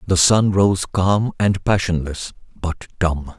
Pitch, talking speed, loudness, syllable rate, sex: 90 Hz, 140 wpm, -19 LUFS, 3.5 syllables/s, male